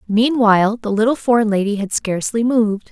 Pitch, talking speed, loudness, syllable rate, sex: 220 Hz, 165 wpm, -16 LUFS, 5.9 syllables/s, female